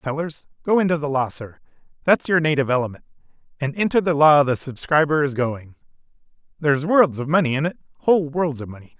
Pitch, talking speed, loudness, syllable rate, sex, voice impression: 150 Hz, 175 wpm, -20 LUFS, 6.2 syllables/s, male, very masculine, very middle-aged, very thick, tensed, slightly powerful, bright, slightly soft, slightly muffled, fluent, slightly raspy, slightly cool, intellectual, sincere, calm, mature, slightly friendly, reassuring, unique, elegant, slightly wild, slightly sweet, lively, kind, slightly modest